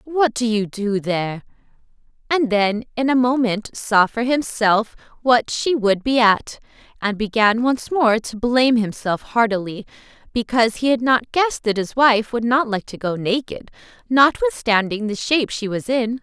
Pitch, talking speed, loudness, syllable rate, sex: 230 Hz, 165 wpm, -19 LUFS, 4.6 syllables/s, female